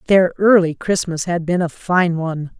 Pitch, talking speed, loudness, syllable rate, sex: 175 Hz, 185 wpm, -17 LUFS, 4.7 syllables/s, female